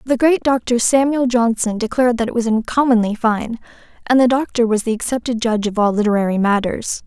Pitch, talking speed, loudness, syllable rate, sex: 235 Hz, 185 wpm, -17 LUFS, 5.8 syllables/s, female